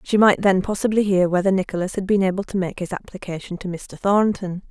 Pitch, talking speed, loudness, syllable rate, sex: 190 Hz, 215 wpm, -21 LUFS, 5.9 syllables/s, female